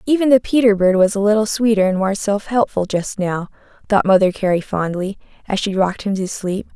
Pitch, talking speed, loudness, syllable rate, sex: 200 Hz, 215 wpm, -17 LUFS, 5.6 syllables/s, female